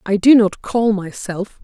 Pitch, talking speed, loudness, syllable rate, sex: 205 Hz, 185 wpm, -16 LUFS, 4.0 syllables/s, female